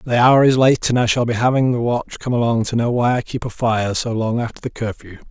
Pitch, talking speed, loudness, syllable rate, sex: 120 Hz, 285 wpm, -18 LUFS, 5.8 syllables/s, male